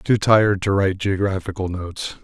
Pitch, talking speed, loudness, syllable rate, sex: 95 Hz, 160 wpm, -20 LUFS, 5.5 syllables/s, male